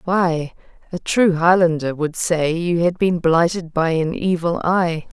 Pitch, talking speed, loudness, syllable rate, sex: 170 Hz, 160 wpm, -18 LUFS, 3.9 syllables/s, female